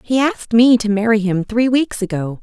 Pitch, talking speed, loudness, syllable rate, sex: 220 Hz, 220 wpm, -16 LUFS, 5.2 syllables/s, female